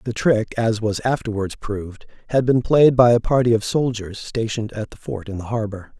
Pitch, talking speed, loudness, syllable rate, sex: 110 Hz, 210 wpm, -20 LUFS, 5.2 syllables/s, male